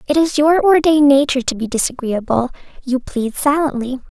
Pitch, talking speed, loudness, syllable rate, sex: 275 Hz, 160 wpm, -16 LUFS, 5.6 syllables/s, female